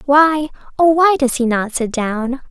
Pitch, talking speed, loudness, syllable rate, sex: 270 Hz, 190 wpm, -15 LUFS, 4.0 syllables/s, female